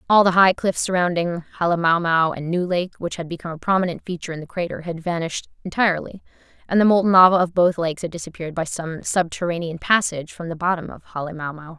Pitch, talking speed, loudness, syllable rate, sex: 170 Hz, 200 wpm, -21 LUFS, 6.6 syllables/s, female